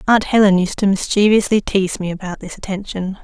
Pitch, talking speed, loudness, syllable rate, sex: 195 Hz, 185 wpm, -16 LUFS, 5.9 syllables/s, female